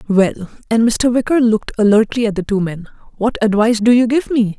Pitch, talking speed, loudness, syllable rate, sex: 220 Hz, 210 wpm, -15 LUFS, 6.0 syllables/s, female